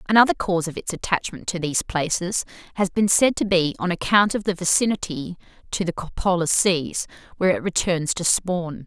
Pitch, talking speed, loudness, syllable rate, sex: 180 Hz, 185 wpm, -22 LUFS, 5.3 syllables/s, female